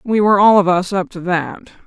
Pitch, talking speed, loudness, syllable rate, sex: 195 Hz, 260 wpm, -14 LUFS, 5.9 syllables/s, female